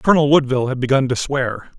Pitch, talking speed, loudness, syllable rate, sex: 135 Hz, 200 wpm, -17 LUFS, 6.5 syllables/s, male